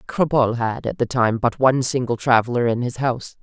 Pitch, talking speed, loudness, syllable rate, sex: 125 Hz, 210 wpm, -20 LUFS, 5.9 syllables/s, female